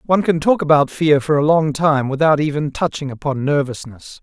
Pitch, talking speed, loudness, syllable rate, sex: 150 Hz, 200 wpm, -17 LUFS, 5.3 syllables/s, male